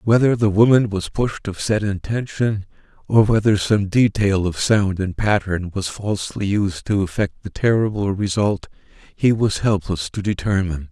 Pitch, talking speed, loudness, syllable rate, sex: 100 Hz, 160 wpm, -19 LUFS, 4.6 syllables/s, male